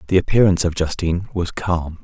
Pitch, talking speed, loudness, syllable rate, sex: 85 Hz, 175 wpm, -19 LUFS, 6.2 syllables/s, male